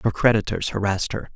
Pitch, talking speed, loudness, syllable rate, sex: 105 Hz, 175 wpm, -22 LUFS, 6.6 syllables/s, male